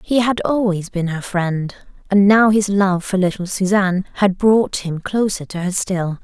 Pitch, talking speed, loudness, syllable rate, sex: 190 Hz, 195 wpm, -17 LUFS, 4.4 syllables/s, female